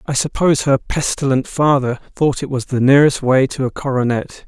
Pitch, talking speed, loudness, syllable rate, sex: 135 Hz, 190 wpm, -16 LUFS, 5.5 syllables/s, male